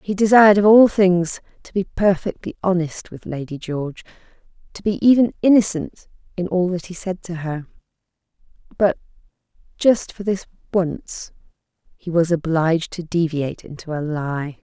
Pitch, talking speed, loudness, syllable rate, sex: 180 Hz, 135 wpm, -19 LUFS, 4.9 syllables/s, female